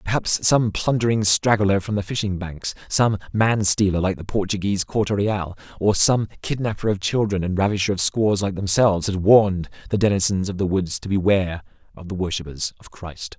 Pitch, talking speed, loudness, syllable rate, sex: 100 Hz, 175 wpm, -21 LUFS, 5.4 syllables/s, male